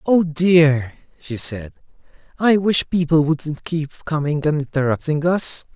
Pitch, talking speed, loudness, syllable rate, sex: 155 Hz, 135 wpm, -18 LUFS, 3.9 syllables/s, male